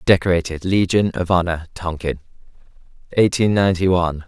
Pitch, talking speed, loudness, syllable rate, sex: 90 Hz, 110 wpm, -19 LUFS, 5.7 syllables/s, male